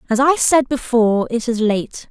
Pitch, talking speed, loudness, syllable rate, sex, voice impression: 240 Hz, 200 wpm, -16 LUFS, 4.7 syllables/s, female, slightly gender-neutral, young, calm